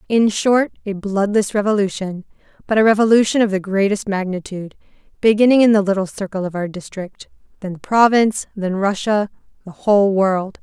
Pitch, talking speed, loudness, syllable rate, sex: 205 Hz, 160 wpm, -17 LUFS, 5.5 syllables/s, female